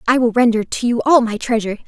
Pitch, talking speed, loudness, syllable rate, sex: 235 Hz, 255 wpm, -16 LUFS, 6.7 syllables/s, female